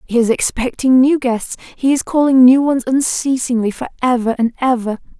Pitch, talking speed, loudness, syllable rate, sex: 250 Hz, 175 wpm, -15 LUFS, 5.1 syllables/s, female